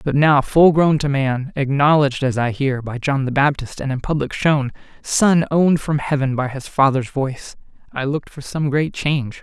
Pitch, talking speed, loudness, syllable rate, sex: 140 Hz, 205 wpm, -18 LUFS, 5.0 syllables/s, male